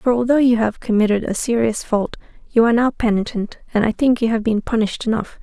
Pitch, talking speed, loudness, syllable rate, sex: 225 Hz, 220 wpm, -18 LUFS, 6.0 syllables/s, female